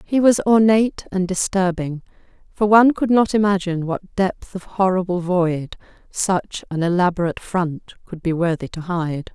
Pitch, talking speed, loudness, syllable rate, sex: 185 Hz, 155 wpm, -19 LUFS, 4.8 syllables/s, female